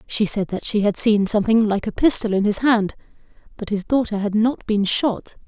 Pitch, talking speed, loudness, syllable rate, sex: 215 Hz, 220 wpm, -19 LUFS, 5.2 syllables/s, female